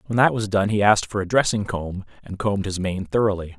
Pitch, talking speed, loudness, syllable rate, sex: 100 Hz, 250 wpm, -22 LUFS, 6.2 syllables/s, male